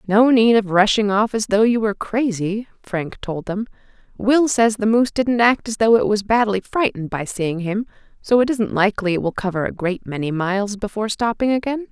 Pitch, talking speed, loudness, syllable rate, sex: 215 Hz, 210 wpm, -19 LUFS, 5.4 syllables/s, female